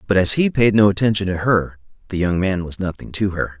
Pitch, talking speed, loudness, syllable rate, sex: 95 Hz, 250 wpm, -18 LUFS, 5.8 syllables/s, male